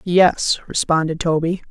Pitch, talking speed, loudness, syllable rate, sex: 170 Hz, 105 wpm, -18 LUFS, 4.1 syllables/s, female